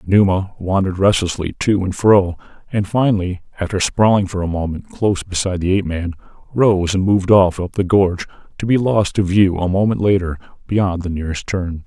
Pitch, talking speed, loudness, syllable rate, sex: 95 Hz, 185 wpm, -17 LUFS, 5.7 syllables/s, male